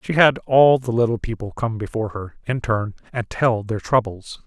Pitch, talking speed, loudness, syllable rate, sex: 115 Hz, 200 wpm, -20 LUFS, 4.8 syllables/s, male